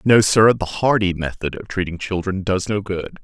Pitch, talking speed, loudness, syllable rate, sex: 95 Hz, 205 wpm, -19 LUFS, 4.8 syllables/s, male